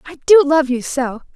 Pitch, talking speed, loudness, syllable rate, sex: 285 Hz, 220 wpm, -15 LUFS, 5.0 syllables/s, female